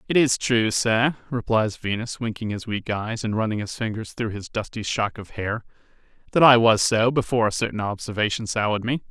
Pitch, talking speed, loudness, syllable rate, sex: 110 Hz, 200 wpm, -23 LUFS, 5.3 syllables/s, male